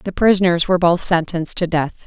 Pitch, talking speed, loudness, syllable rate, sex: 175 Hz, 205 wpm, -17 LUFS, 5.9 syllables/s, female